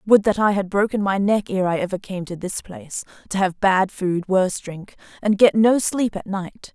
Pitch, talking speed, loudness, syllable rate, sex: 195 Hz, 230 wpm, -21 LUFS, 4.9 syllables/s, female